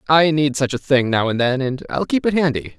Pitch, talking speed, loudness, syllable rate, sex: 140 Hz, 280 wpm, -18 LUFS, 5.5 syllables/s, male